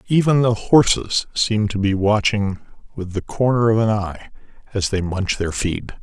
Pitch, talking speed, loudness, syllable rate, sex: 105 Hz, 180 wpm, -19 LUFS, 4.6 syllables/s, male